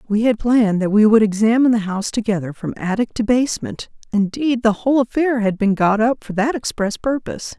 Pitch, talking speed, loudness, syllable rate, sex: 220 Hz, 205 wpm, -18 LUFS, 5.9 syllables/s, female